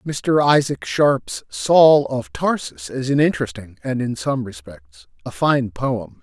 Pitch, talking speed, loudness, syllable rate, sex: 120 Hz, 155 wpm, -19 LUFS, 3.7 syllables/s, male